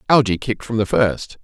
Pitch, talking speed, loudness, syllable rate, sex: 110 Hz, 210 wpm, -19 LUFS, 5.7 syllables/s, male